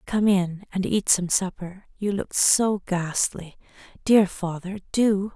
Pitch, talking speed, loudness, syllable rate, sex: 190 Hz, 145 wpm, -23 LUFS, 3.6 syllables/s, female